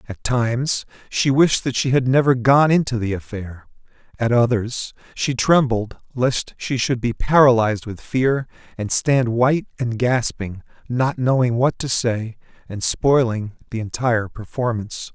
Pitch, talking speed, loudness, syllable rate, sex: 120 Hz, 150 wpm, -20 LUFS, 4.4 syllables/s, male